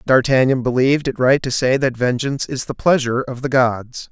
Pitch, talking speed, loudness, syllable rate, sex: 130 Hz, 205 wpm, -17 LUFS, 5.5 syllables/s, male